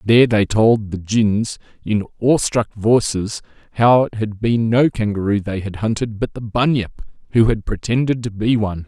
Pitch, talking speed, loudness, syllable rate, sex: 110 Hz, 185 wpm, -18 LUFS, 4.7 syllables/s, male